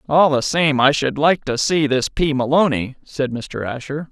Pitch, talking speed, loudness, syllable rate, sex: 140 Hz, 205 wpm, -18 LUFS, 4.4 syllables/s, male